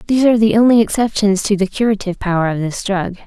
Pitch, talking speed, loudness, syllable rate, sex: 205 Hz, 220 wpm, -15 LUFS, 6.9 syllables/s, female